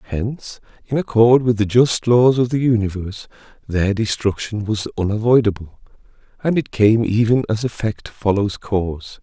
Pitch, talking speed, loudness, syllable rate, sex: 110 Hz, 145 wpm, -18 LUFS, 4.9 syllables/s, male